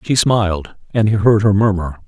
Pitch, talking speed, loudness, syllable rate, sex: 100 Hz, 200 wpm, -15 LUFS, 5.1 syllables/s, male